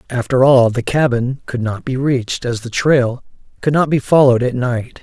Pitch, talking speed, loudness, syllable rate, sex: 130 Hz, 205 wpm, -15 LUFS, 5.0 syllables/s, male